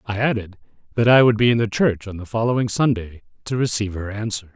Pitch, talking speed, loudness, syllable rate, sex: 110 Hz, 225 wpm, -20 LUFS, 6.3 syllables/s, male